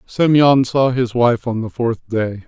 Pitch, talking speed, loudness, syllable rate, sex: 120 Hz, 195 wpm, -16 LUFS, 3.9 syllables/s, male